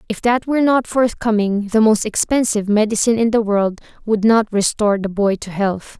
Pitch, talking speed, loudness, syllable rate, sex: 215 Hz, 190 wpm, -17 LUFS, 5.4 syllables/s, female